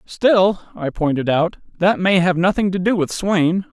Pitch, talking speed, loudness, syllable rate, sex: 180 Hz, 190 wpm, -18 LUFS, 4.1 syllables/s, male